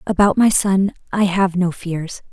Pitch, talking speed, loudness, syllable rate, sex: 190 Hz, 180 wpm, -17 LUFS, 4.1 syllables/s, female